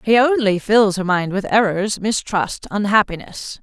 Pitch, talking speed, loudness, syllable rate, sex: 205 Hz, 150 wpm, -17 LUFS, 4.4 syllables/s, female